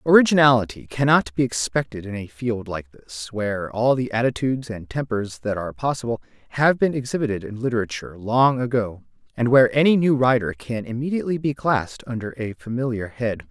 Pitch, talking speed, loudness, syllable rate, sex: 120 Hz, 170 wpm, -22 LUFS, 5.8 syllables/s, male